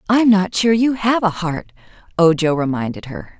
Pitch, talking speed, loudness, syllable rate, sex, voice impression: 195 Hz, 175 wpm, -17 LUFS, 4.7 syllables/s, female, very feminine, very middle-aged, very thin, very tensed, powerful, bright, slightly soft, clear, halting, slightly raspy, slightly cool, very intellectual, refreshing, sincere, slightly calm, friendly, reassuring, unique, elegant, sweet, lively, kind, slightly intense